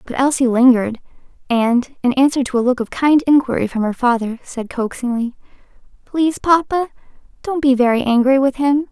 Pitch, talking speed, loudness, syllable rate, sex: 260 Hz, 170 wpm, -16 LUFS, 5.6 syllables/s, female